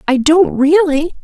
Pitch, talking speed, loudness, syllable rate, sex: 310 Hz, 145 wpm, -12 LUFS, 4.1 syllables/s, female